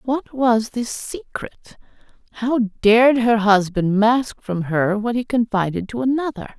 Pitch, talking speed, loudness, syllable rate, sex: 230 Hz, 145 wpm, -19 LUFS, 4.2 syllables/s, female